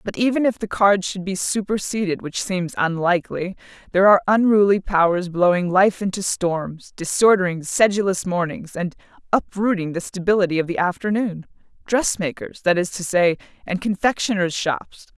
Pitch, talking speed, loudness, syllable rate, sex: 190 Hz, 140 wpm, -20 LUFS, 5.1 syllables/s, female